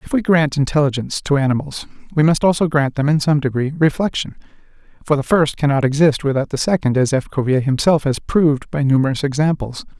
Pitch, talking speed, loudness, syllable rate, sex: 145 Hz, 190 wpm, -17 LUFS, 6.1 syllables/s, male